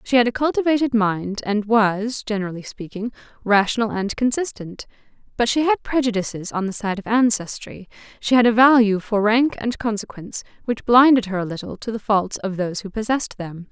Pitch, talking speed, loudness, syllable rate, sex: 220 Hz, 185 wpm, -20 LUFS, 5.5 syllables/s, female